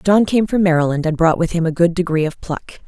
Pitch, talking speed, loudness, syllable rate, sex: 170 Hz, 270 wpm, -17 LUFS, 5.7 syllables/s, female